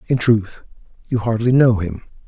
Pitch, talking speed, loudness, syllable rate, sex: 110 Hz, 160 wpm, -17 LUFS, 4.8 syllables/s, male